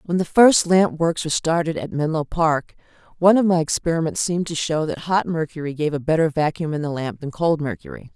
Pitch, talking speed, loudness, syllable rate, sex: 160 Hz, 220 wpm, -20 LUFS, 5.8 syllables/s, female